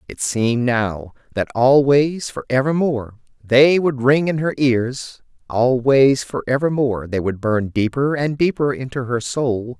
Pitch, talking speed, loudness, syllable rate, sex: 130 Hz, 155 wpm, -18 LUFS, 4.2 syllables/s, male